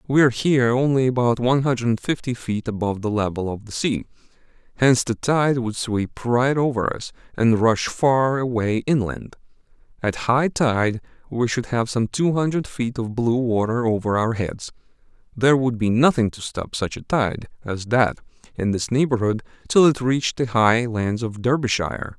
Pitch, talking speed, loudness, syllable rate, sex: 120 Hz, 180 wpm, -21 LUFS, 4.9 syllables/s, male